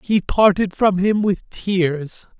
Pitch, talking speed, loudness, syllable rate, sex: 190 Hz, 150 wpm, -18 LUFS, 3.2 syllables/s, male